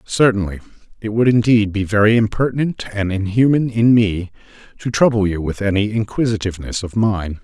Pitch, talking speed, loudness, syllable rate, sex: 105 Hz, 155 wpm, -17 LUFS, 5.4 syllables/s, male